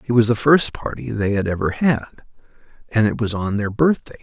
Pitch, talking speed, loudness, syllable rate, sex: 115 Hz, 215 wpm, -19 LUFS, 5.6 syllables/s, male